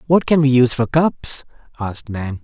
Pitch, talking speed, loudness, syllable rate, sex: 130 Hz, 200 wpm, -17 LUFS, 5.2 syllables/s, male